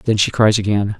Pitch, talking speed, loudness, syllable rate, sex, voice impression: 105 Hz, 240 wpm, -16 LUFS, 5.3 syllables/s, male, masculine, adult-like, slightly weak, refreshing, slightly sincere, calm, slightly modest